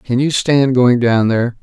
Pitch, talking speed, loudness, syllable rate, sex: 125 Hz, 220 wpm, -13 LUFS, 4.5 syllables/s, male